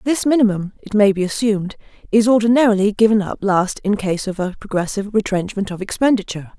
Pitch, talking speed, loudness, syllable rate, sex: 205 Hz, 175 wpm, -18 LUFS, 6.2 syllables/s, female